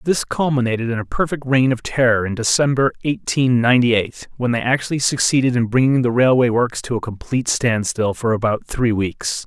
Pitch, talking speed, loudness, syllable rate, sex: 125 Hz, 190 wpm, -18 LUFS, 5.5 syllables/s, male